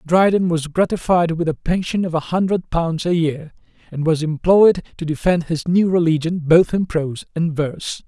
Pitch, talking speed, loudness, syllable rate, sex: 165 Hz, 185 wpm, -18 LUFS, 4.9 syllables/s, male